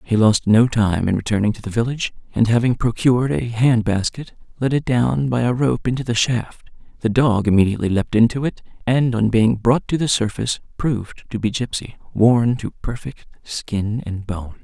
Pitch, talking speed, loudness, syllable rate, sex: 115 Hz, 195 wpm, -19 LUFS, 5.1 syllables/s, male